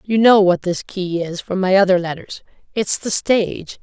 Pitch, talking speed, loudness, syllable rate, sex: 190 Hz, 205 wpm, -17 LUFS, 4.8 syllables/s, female